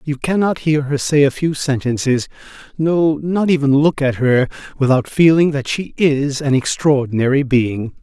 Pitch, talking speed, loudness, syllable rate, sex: 145 Hz, 155 wpm, -16 LUFS, 4.6 syllables/s, male